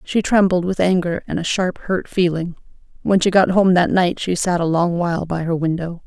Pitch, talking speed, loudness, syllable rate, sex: 180 Hz, 230 wpm, -18 LUFS, 5.1 syllables/s, female